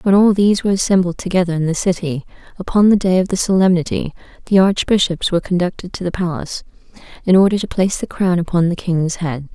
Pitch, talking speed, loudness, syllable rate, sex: 180 Hz, 200 wpm, -16 LUFS, 6.5 syllables/s, female